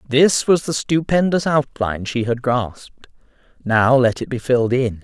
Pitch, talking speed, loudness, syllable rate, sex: 130 Hz, 165 wpm, -18 LUFS, 4.8 syllables/s, male